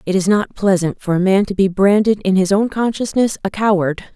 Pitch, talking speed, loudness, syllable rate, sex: 200 Hz, 230 wpm, -16 LUFS, 5.3 syllables/s, female